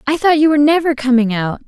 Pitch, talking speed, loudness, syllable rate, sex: 280 Hz, 250 wpm, -14 LUFS, 6.7 syllables/s, female